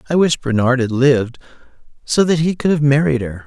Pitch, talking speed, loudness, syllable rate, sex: 140 Hz, 210 wpm, -16 LUFS, 5.8 syllables/s, male